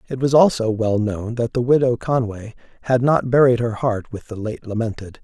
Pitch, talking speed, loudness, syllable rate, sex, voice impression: 120 Hz, 205 wpm, -19 LUFS, 5.1 syllables/s, male, masculine, middle-aged, tensed, powerful, slightly dark, slightly muffled, slightly raspy, calm, mature, slightly friendly, reassuring, wild, lively, slightly kind